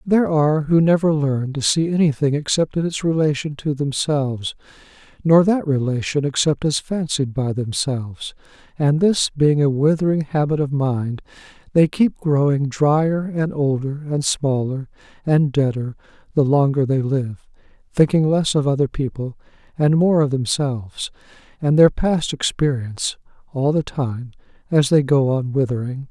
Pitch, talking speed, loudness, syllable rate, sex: 145 Hz, 145 wpm, -19 LUFS, 4.6 syllables/s, male